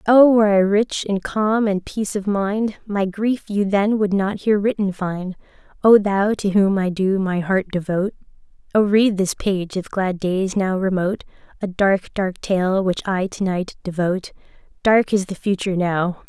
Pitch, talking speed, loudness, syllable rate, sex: 195 Hz, 185 wpm, -20 LUFS, 4.6 syllables/s, female